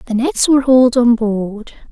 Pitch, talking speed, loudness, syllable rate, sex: 240 Hz, 190 wpm, -13 LUFS, 5.0 syllables/s, female